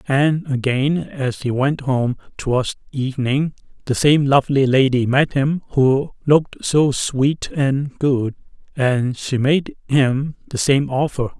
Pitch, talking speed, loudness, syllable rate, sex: 135 Hz, 140 wpm, -19 LUFS, 3.8 syllables/s, male